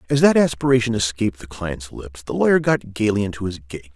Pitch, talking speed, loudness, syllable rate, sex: 110 Hz, 210 wpm, -20 LUFS, 6.2 syllables/s, male